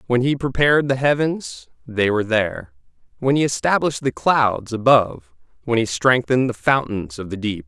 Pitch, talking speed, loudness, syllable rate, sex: 120 Hz, 170 wpm, -19 LUFS, 5.3 syllables/s, male